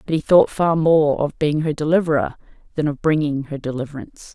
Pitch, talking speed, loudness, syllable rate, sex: 150 Hz, 195 wpm, -19 LUFS, 5.7 syllables/s, female